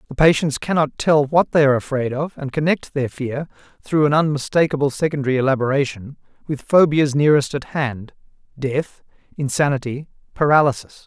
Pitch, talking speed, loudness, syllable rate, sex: 145 Hz, 140 wpm, -19 LUFS, 5.6 syllables/s, male